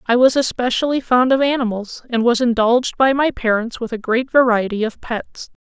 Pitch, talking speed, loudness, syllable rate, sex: 240 Hz, 190 wpm, -17 LUFS, 5.2 syllables/s, female